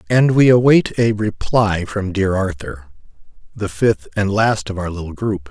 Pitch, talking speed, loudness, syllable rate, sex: 100 Hz, 165 wpm, -17 LUFS, 4.3 syllables/s, male